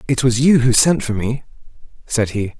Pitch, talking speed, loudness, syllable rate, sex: 120 Hz, 210 wpm, -16 LUFS, 5.0 syllables/s, male